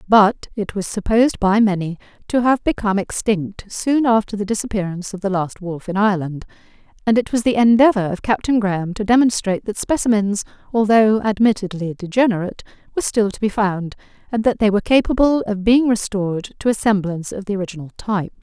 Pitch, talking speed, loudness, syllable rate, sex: 210 Hz, 180 wpm, -18 LUFS, 6.0 syllables/s, female